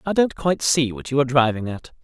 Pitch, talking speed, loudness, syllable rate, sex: 135 Hz, 265 wpm, -20 LUFS, 6.5 syllables/s, male